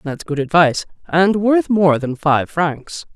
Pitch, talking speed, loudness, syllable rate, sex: 165 Hz, 170 wpm, -16 LUFS, 3.9 syllables/s, female